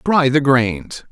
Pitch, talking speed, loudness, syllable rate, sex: 135 Hz, 160 wpm, -15 LUFS, 3.1 syllables/s, male